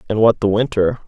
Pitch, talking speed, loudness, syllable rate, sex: 110 Hz, 225 wpm, -16 LUFS, 6.0 syllables/s, male